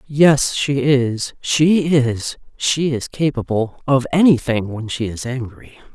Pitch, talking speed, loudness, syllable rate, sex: 130 Hz, 140 wpm, -18 LUFS, 3.5 syllables/s, female